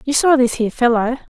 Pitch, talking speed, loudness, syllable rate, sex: 250 Hz, 215 wpm, -16 LUFS, 6.5 syllables/s, female